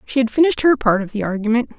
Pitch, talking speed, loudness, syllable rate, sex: 235 Hz, 270 wpm, -17 LUFS, 7.4 syllables/s, female